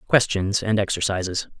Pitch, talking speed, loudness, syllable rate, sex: 100 Hz, 115 wpm, -22 LUFS, 5.0 syllables/s, male